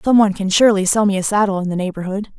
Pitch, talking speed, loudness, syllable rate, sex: 200 Hz, 275 wpm, -16 LUFS, 7.5 syllables/s, female